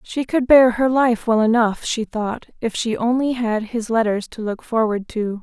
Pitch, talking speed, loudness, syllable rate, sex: 230 Hz, 210 wpm, -19 LUFS, 4.4 syllables/s, female